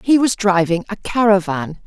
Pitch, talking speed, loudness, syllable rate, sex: 200 Hz, 160 wpm, -17 LUFS, 4.7 syllables/s, female